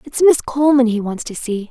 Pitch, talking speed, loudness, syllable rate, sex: 250 Hz, 245 wpm, -16 LUFS, 5.7 syllables/s, female